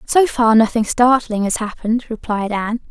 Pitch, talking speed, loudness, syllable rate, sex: 225 Hz, 165 wpm, -17 LUFS, 5.2 syllables/s, female